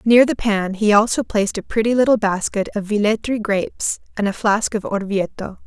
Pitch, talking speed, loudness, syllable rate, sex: 210 Hz, 190 wpm, -19 LUFS, 5.2 syllables/s, female